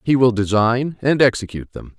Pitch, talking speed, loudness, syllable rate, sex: 120 Hz, 180 wpm, -17 LUFS, 5.4 syllables/s, male